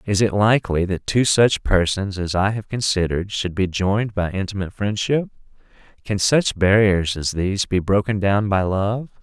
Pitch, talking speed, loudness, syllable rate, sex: 100 Hz, 175 wpm, -20 LUFS, 5.0 syllables/s, male